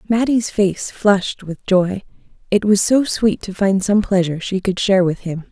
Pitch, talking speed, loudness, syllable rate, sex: 195 Hz, 195 wpm, -17 LUFS, 4.7 syllables/s, female